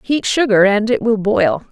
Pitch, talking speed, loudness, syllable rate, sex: 215 Hz, 210 wpm, -15 LUFS, 4.4 syllables/s, female